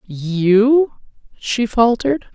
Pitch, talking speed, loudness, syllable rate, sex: 230 Hz, 75 wpm, -16 LUFS, 2.8 syllables/s, female